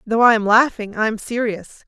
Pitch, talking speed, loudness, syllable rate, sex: 220 Hz, 225 wpm, -17 LUFS, 5.3 syllables/s, female